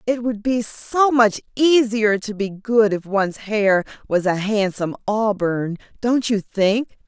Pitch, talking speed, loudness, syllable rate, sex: 215 Hz, 160 wpm, -20 LUFS, 3.9 syllables/s, female